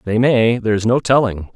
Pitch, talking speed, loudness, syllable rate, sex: 115 Hz, 195 wpm, -16 LUFS, 5.6 syllables/s, male